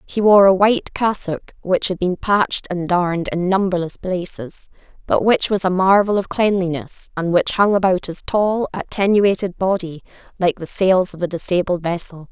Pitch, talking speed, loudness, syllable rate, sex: 185 Hz, 175 wpm, -18 LUFS, 4.9 syllables/s, female